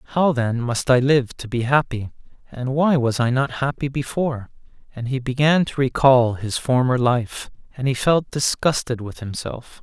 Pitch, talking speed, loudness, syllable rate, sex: 130 Hz, 175 wpm, -20 LUFS, 4.6 syllables/s, male